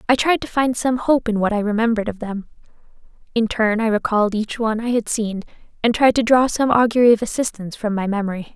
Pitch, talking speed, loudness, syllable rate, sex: 225 Hz, 225 wpm, -19 LUFS, 6.3 syllables/s, female